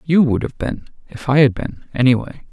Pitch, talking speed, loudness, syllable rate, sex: 135 Hz, 240 wpm, -18 LUFS, 4.9 syllables/s, male